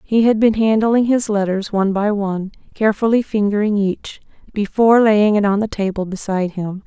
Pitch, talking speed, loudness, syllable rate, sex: 210 Hz, 175 wpm, -17 LUFS, 5.5 syllables/s, female